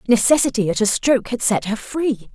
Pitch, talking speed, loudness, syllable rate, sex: 235 Hz, 205 wpm, -18 LUFS, 5.6 syllables/s, female